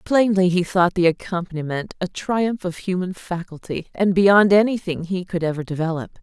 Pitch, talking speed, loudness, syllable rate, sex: 180 Hz, 165 wpm, -20 LUFS, 5.0 syllables/s, female